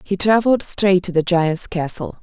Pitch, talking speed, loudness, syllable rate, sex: 185 Hz, 190 wpm, -18 LUFS, 4.8 syllables/s, female